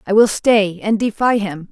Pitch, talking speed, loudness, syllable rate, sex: 210 Hz, 210 wpm, -16 LUFS, 4.5 syllables/s, female